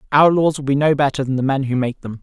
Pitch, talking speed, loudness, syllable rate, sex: 140 Hz, 325 wpm, -17 LUFS, 6.5 syllables/s, male